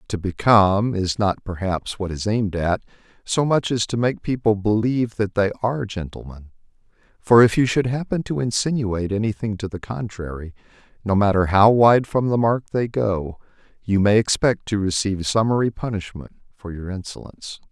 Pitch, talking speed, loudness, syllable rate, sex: 105 Hz, 175 wpm, -20 LUFS, 5.2 syllables/s, male